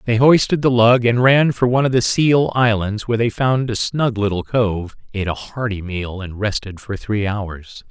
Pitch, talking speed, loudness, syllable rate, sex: 110 Hz, 215 wpm, -17 LUFS, 4.8 syllables/s, male